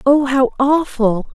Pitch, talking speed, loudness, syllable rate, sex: 270 Hz, 130 wpm, -16 LUFS, 3.5 syllables/s, female